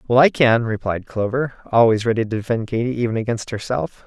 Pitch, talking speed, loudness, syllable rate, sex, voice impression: 115 Hz, 190 wpm, -19 LUFS, 5.9 syllables/s, male, masculine, adult-like, tensed, bright, clear, slightly nasal, intellectual, friendly, slightly unique, lively, slightly kind, light